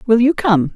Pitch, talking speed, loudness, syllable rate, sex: 225 Hz, 240 wpm, -15 LUFS, 4.9 syllables/s, female